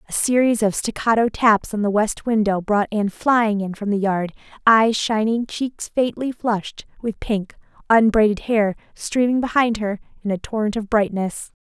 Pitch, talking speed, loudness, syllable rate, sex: 215 Hz, 170 wpm, -20 LUFS, 4.6 syllables/s, female